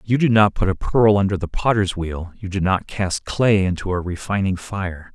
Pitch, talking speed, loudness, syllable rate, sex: 100 Hz, 220 wpm, -20 LUFS, 4.8 syllables/s, male